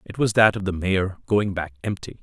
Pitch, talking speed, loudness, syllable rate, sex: 95 Hz, 245 wpm, -22 LUFS, 5.1 syllables/s, male